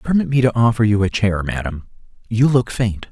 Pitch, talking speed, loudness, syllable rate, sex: 110 Hz, 210 wpm, -18 LUFS, 5.4 syllables/s, male